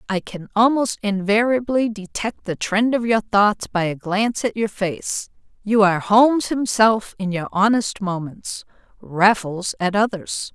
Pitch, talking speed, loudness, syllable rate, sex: 210 Hz, 150 wpm, -20 LUFS, 4.2 syllables/s, female